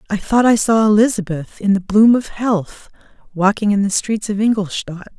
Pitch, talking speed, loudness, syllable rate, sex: 205 Hz, 185 wpm, -16 LUFS, 4.9 syllables/s, female